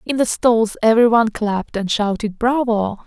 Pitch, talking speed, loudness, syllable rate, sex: 220 Hz, 155 wpm, -17 LUFS, 4.9 syllables/s, female